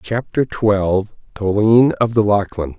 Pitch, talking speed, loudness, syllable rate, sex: 105 Hz, 130 wpm, -16 LUFS, 4.4 syllables/s, male